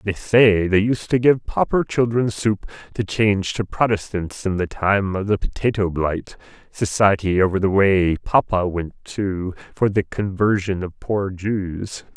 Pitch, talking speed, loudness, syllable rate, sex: 100 Hz, 165 wpm, -20 LUFS, 4.2 syllables/s, male